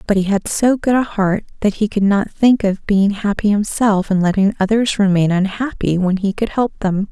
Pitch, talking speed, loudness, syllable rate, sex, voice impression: 205 Hz, 220 wpm, -16 LUFS, 4.9 syllables/s, female, very feminine, slightly young, slightly adult-like, very thin, relaxed, weak, slightly bright, soft, slightly clear, fluent, slightly raspy, very cute, intellectual, very refreshing, sincere, slightly calm, very friendly, very reassuring, slightly unique, very elegant, slightly wild, very sweet, lively, very kind, slightly sharp, slightly modest, light